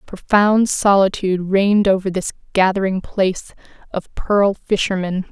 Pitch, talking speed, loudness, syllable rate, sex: 195 Hz, 115 wpm, -17 LUFS, 4.6 syllables/s, female